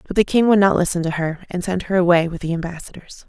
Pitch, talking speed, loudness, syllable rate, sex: 180 Hz, 275 wpm, -19 LUFS, 6.7 syllables/s, female